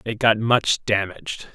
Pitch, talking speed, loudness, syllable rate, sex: 110 Hz, 155 wpm, -20 LUFS, 4.1 syllables/s, male